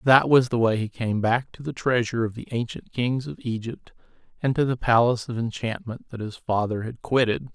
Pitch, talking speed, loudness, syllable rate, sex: 120 Hz, 215 wpm, -24 LUFS, 5.4 syllables/s, male